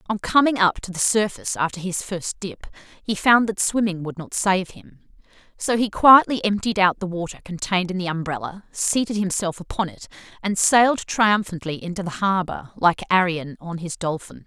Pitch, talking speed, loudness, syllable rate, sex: 185 Hz, 185 wpm, -21 LUFS, 5.1 syllables/s, female